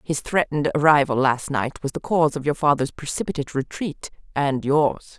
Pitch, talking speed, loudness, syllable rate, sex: 145 Hz, 175 wpm, -22 LUFS, 5.4 syllables/s, female